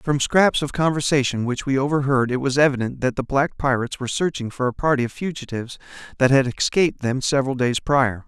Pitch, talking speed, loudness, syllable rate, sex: 135 Hz, 205 wpm, -21 LUFS, 6.0 syllables/s, male